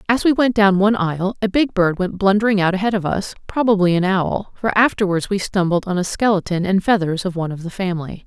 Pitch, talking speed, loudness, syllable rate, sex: 195 Hz, 230 wpm, -18 LUFS, 6.1 syllables/s, female